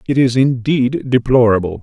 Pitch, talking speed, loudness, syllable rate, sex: 125 Hz, 130 wpm, -14 LUFS, 4.7 syllables/s, male